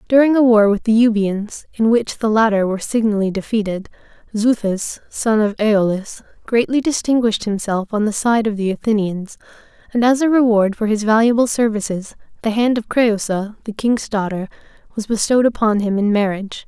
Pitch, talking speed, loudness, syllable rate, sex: 215 Hz, 170 wpm, -17 LUFS, 5.4 syllables/s, female